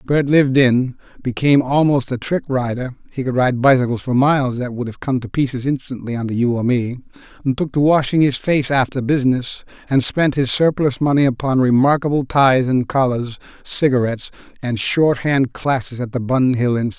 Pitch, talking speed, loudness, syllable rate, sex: 130 Hz, 175 wpm, -17 LUFS, 5.4 syllables/s, male